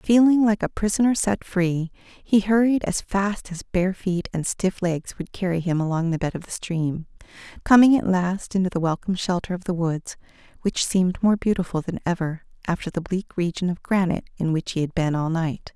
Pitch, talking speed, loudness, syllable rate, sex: 185 Hz, 205 wpm, -23 LUFS, 5.2 syllables/s, female